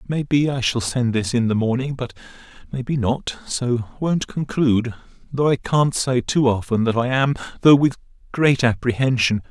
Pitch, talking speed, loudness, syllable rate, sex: 125 Hz, 185 wpm, -20 LUFS, 4.1 syllables/s, male